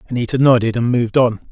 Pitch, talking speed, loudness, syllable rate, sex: 120 Hz, 200 wpm, -15 LUFS, 7.2 syllables/s, male